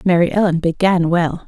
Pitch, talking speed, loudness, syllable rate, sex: 175 Hz, 165 wpm, -16 LUFS, 5.1 syllables/s, female